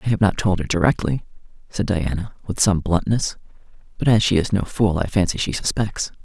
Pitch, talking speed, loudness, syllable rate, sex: 95 Hz, 200 wpm, -21 LUFS, 5.6 syllables/s, male